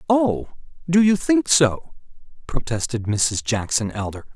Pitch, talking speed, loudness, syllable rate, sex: 140 Hz, 125 wpm, -21 LUFS, 4.2 syllables/s, male